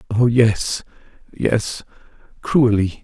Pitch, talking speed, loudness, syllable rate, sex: 115 Hz, 80 wpm, -18 LUFS, 2.8 syllables/s, male